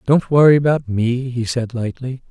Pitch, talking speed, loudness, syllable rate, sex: 125 Hz, 180 wpm, -17 LUFS, 4.7 syllables/s, male